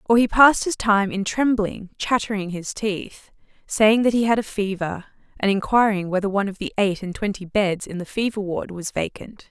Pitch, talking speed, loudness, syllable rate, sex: 205 Hz, 200 wpm, -21 LUFS, 5.2 syllables/s, female